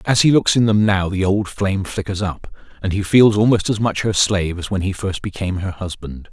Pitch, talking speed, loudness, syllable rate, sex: 100 Hz, 245 wpm, -18 LUFS, 5.6 syllables/s, male